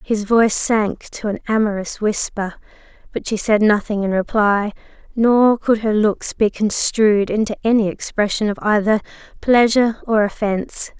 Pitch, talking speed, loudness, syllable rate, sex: 215 Hz, 145 wpm, -18 LUFS, 4.6 syllables/s, female